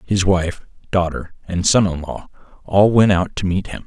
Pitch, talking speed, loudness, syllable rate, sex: 95 Hz, 200 wpm, -18 LUFS, 4.6 syllables/s, male